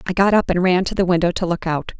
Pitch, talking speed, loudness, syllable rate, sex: 180 Hz, 330 wpm, -18 LUFS, 6.4 syllables/s, female